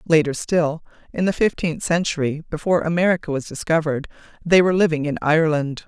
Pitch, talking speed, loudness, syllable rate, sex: 160 Hz, 155 wpm, -20 LUFS, 6.2 syllables/s, female